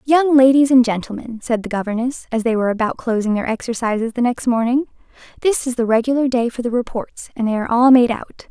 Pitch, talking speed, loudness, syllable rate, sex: 240 Hz, 220 wpm, -17 LUFS, 6.1 syllables/s, female